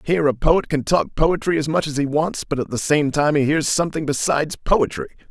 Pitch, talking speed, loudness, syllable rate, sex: 145 Hz, 240 wpm, -20 LUFS, 5.6 syllables/s, male